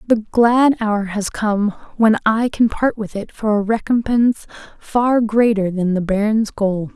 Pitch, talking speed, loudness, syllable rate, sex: 215 Hz, 175 wpm, -17 LUFS, 3.9 syllables/s, female